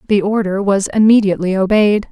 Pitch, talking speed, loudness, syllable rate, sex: 200 Hz, 140 wpm, -14 LUFS, 5.9 syllables/s, female